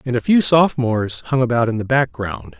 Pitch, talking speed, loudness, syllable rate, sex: 125 Hz, 210 wpm, -17 LUFS, 5.6 syllables/s, male